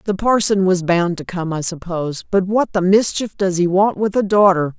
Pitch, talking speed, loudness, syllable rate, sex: 185 Hz, 225 wpm, -17 LUFS, 5.0 syllables/s, female